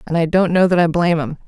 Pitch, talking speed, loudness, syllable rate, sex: 170 Hz, 325 wpm, -16 LUFS, 7.1 syllables/s, female